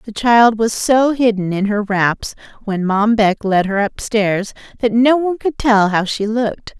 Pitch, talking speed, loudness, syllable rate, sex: 220 Hz, 205 wpm, -15 LUFS, 4.3 syllables/s, female